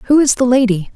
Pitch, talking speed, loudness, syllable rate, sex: 245 Hz, 250 wpm, -13 LUFS, 5.6 syllables/s, female